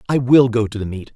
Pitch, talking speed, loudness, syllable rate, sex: 115 Hz, 315 wpm, -16 LUFS, 6.2 syllables/s, male